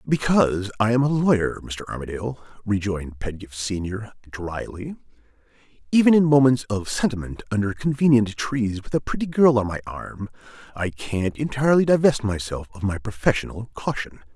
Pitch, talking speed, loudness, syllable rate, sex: 110 Hz, 145 wpm, -22 LUFS, 5.4 syllables/s, male